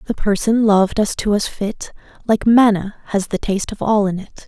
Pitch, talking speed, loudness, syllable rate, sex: 210 Hz, 215 wpm, -17 LUFS, 5.2 syllables/s, female